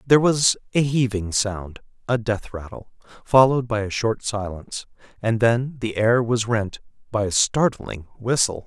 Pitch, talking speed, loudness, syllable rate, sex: 115 Hz, 160 wpm, -21 LUFS, 4.5 syllables/s, male